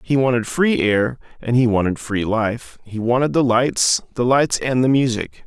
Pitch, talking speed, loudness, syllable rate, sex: 120 Hz, 200 wpm, -18 LUFS, 4.4 syllables/s, male